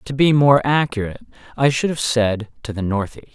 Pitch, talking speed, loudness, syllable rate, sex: 125 Hz, 195 wpm, -18 LUFS, 5.6 syllables/s, male